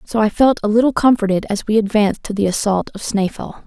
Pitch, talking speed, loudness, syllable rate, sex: 215 Hz, 230 wpm, -17 LUFS, 6.1 syllables/s, female